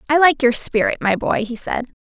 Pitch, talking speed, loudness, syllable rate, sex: 250 Hz, 235 wpm, -18 LUFS, 5.2 syllables/s, female